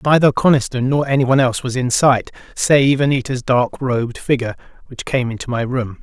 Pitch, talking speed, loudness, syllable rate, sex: 130 Hz, 180 wpm, -17 LUFS, 5.6 syllables/s, male